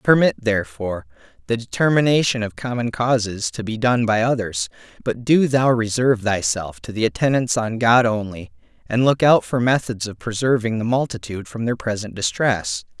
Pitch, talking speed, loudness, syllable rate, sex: 115 Hz, 165 wpm, -20 LUFS, 5.3 syllables/s, male